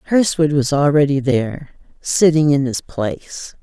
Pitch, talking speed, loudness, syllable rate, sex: 145 Hz, 130 wpm, -16 LUFS, 4.6 syllables/s, female